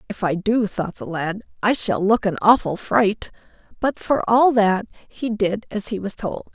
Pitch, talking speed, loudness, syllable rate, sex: 210 Hz, 200 wpm, -21 LUFS, 4.3 syllables/s, female